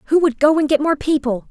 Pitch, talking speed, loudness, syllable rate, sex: 295 Hz, 280 wpm, -17 LUFS, 6.2 syllables/s, female